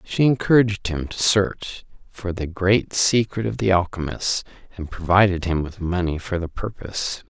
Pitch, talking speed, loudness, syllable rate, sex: 95 Hz, 165 wpm, -21 LUFS, 4.7 syllables/s, male